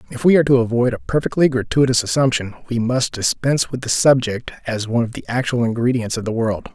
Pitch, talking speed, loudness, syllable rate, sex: 120 Hz, 215 wpm, -18 LUFS, 6.3 syllables/s, male